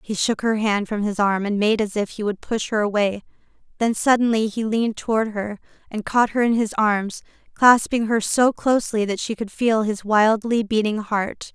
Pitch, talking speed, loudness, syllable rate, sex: 215 Hz, 210 wpm, -21 LUFS, 4.9 syllables/s, female